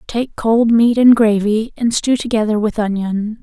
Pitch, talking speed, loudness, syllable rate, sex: 220 Hz, 175 wpm, -15 LUFS, 4.3 syllables/s, female